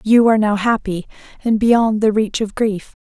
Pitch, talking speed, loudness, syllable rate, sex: 215 Hz, 200 wpm, -16 LUFS, 4.9 syllables/s, female